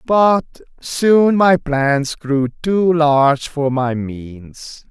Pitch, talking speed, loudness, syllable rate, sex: 150 Hz, 120 wpm, -15 LUFS, 2.4 syllables/s, male